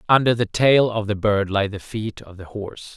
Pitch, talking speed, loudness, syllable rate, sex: 105 Hz, 245 wpm, -20 LUFS, 5.1 syllables/s, male